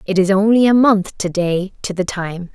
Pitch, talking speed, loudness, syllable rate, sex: 195 Hz, 235 wpm, -16 LUFS, 4.7 syllables/s, female